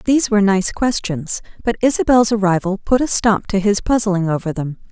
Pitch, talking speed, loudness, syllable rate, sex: 205 Hz, 185 wpm, -17 LUFS, 5.5 syllables/s, female